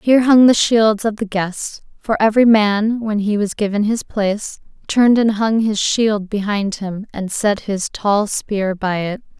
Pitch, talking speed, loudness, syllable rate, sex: 210 Hz, 190 wpm, -17 LUFS, 4.2 syllables/s, female